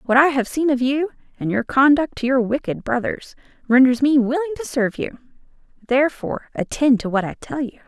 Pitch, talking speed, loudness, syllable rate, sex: 265 Hz, 200 wpm, -20 LUFS, 5.8 syllables/s, female